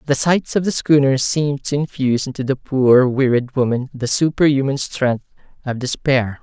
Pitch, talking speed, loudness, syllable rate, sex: 135 Hz, 170 wpm, -18 LUFS, 5.0 syllables/s, male